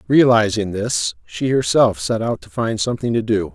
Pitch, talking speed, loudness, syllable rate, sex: 115 Hz, 185 wpm, -18 LUFS, 4.9 syllables/s, male